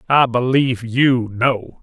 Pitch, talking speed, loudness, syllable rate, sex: 125 Hz, 130 wpm, -17 LUFS, 3.7 syllables/s, male